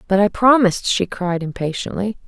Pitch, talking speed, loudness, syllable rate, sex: 195 Hz, 160 wpm, -18 LUFS, 5.4 syllables/s, female